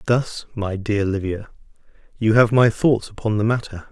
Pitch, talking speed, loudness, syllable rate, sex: 110 Hz, 170 wpm, -20 LUFS, 4.7 syllables/s, male